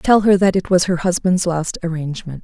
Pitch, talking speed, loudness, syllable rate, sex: 175 Hz, 220 wpm, -17 LUFS, 5.4 syllables/s, female